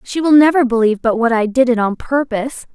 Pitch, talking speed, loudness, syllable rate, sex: 245 Hz, 240 wpm, -14 LUFS, 6.2 syllables/s, female